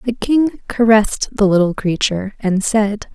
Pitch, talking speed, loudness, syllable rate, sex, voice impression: 215 Hz, 155 wpm, -16 LUFS, 4.7 syllables/s, female, feminine, slightly young, slightly tensed, bright, slightly soft, clear, fluent, slightly cute, calm, friendly, slightly reassuring, lively, sharp, light